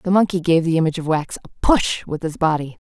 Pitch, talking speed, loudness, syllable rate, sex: 165 Hz, 250 wpm, -19 LUFS, 5.9 syllables/s, female